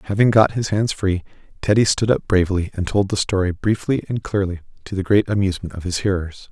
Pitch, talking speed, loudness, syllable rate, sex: 100 Hz, 210 wpm, -20 LUFS, 6.0 syllables/s, male